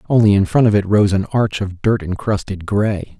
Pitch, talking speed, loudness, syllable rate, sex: 100 Hz, 225 wpm, -17 LUFS, 5.1 syllables/s, male